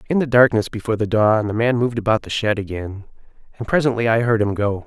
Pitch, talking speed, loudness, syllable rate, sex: 110 Hz, 235 wpm, -19 LUFS, 6.5 syllables/s, male